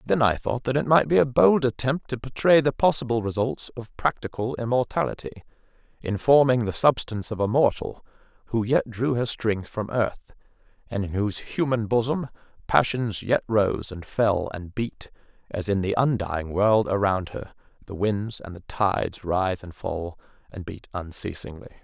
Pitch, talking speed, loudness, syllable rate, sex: 110 Hz, 170 wpm, -24 LUFS, 4.8 syllables/s, male